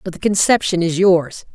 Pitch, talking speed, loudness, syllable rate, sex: 180 Hz, 195 wpm, -16 LUFS, 5.1 syllables/s, female